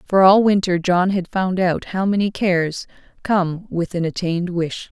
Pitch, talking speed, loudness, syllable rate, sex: 185 Hz, 180 wpm, -19 LUFS, 4.5 syllables/s, female